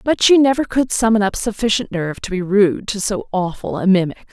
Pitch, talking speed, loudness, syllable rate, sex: 210 Hz, 220 wpm, -17 LUFS, 5.5 syllables/s, female